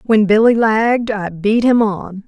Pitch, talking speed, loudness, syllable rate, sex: 215 Hz, 185 wpm, -14 LUFS, 4.2 syllables/s, female